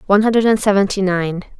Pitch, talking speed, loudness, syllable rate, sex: 200 Hz, 150 wpm, -16 LUFS, 6.2 syllables/s, female